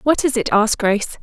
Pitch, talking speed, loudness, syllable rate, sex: 230 Hz, 245 wpm, -17 LUFS, 6.3 syllables/s, female